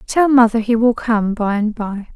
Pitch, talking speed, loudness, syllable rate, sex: 225 Hz, 225 wpm, -16 LUFS, 4.5 syllables/s, female